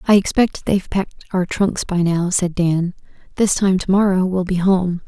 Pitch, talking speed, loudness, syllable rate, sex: 185 Hz, 190 wpm, -18 LUFS, 5.0 syllables/s, female